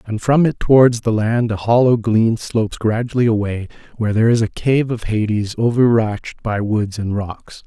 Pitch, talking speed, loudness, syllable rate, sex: 115 Hz, 190 wpm, -17 LUFS, 5.0 syllables/s, male